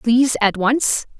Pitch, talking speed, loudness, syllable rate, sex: 240 Hz, 150 wpm, -17 LUFS, 4.0 syllables/s, female